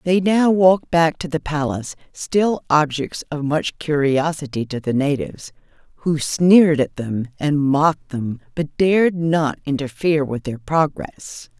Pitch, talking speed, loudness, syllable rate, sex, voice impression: 150 Hz, 150 wpm, -19 LUFS, 4.4 syllables/s, female, slightly feminine, very gender-neutral, very middle-aged, slightly thick, slightly tensed, powerful, slightly bright, slightly soft, slightly muffled, fluent, raspy, slightly cool, slightly intellectual, slightly refreshing, sincere, very calm, slightly friendly, slightly reassuring, very unique, slightly elegant, very wild, slightly sweet, lively, kind, slightly modest